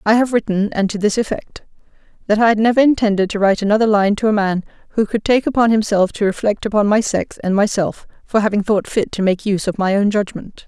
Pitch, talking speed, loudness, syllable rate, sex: 210 Hz, 235 wpm, -17 LUFS, 6.1 syllables/s, female